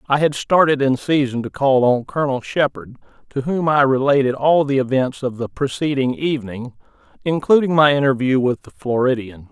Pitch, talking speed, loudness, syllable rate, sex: 135 Hz, 170 wpm, -18 LUFS, 5.3 syllables/s, male